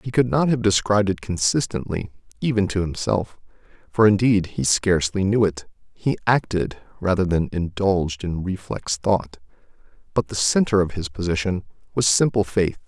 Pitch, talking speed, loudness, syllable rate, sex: 95 Hz, 155 wpm, -21 LUFS, 5.0 syllables/s, male